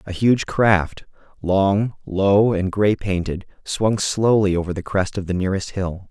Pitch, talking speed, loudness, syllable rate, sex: 100 Hz, 165 wpm, -20 LUFS, 4.1 syllables/s, male